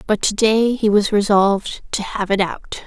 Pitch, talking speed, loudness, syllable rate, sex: 205 Hz, 190 wpm, -17 LUFS, 4.5 syllables/s, female